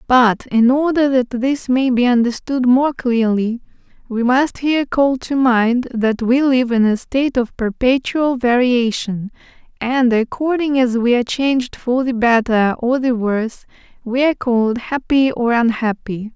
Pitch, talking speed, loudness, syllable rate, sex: 245 Hz, 160 wpm, -16 LUFS, 4.3 syllables/s, female